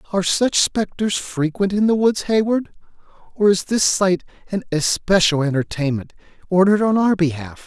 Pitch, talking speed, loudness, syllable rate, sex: 185 Hz, 150 wpm, -18 LUFS, 5.0 syllables/s, male